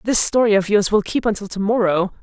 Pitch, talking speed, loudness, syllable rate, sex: 205 Hz, 245 wpm, -18 LUFS, 5.9 syllables/s, female